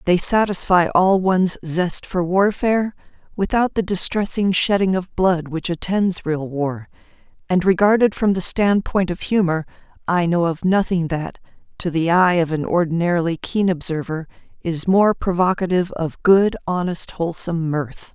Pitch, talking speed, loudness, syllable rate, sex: 180 Hz, 150 wpm, -19 LUFS, 4.7 syllables/s, female